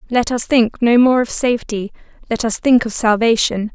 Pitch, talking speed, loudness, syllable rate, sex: 230 Hz, 175 wpm, -15 LUFS, 5.1 syllables/s, female